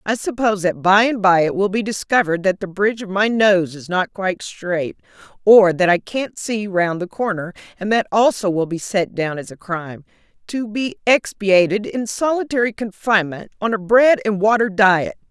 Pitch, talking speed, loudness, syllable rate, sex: 200 Hz, 195 wpm, -18 LUFS, 5.0 syllables/s, female